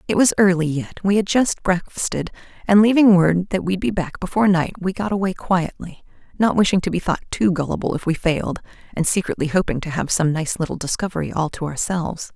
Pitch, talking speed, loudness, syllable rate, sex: 180 Hz, 210 wpm, -20 LUFS, 5.9 syllables/s, female